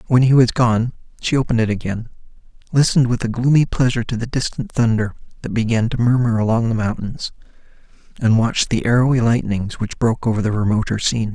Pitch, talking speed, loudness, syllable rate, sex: 115 Hz, 185 wpm, -18 LUFS, 6.3 syllables/s, male